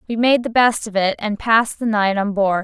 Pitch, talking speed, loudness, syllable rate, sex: 215 Hz, 275 wpm, -17 LUFS, 5.3 syllables/s, female